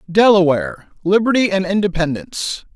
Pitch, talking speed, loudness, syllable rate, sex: 190 Hz, 65 wpm, -16 LUFS, 5.6 syllables/s, male